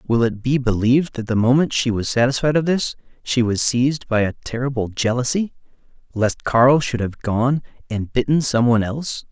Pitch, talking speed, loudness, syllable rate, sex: 125 Hz, 185 wpm, -19 LUFS, 5.2 syllables/s, male